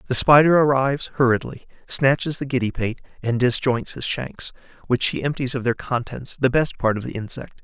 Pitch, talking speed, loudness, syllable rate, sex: 130 Hz, 190 wpm, -21 LUFS, 5.3 syllables/s, male